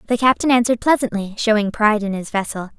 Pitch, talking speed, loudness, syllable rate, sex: 220 Hz, 195 wpm, -18 LUFS, 6.8 syllables/s, female